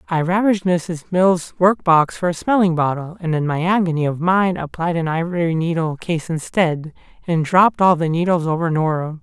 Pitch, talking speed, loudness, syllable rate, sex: 170 Hz, 190 wpm, -18 LUFS, 5.1 syllables/s, male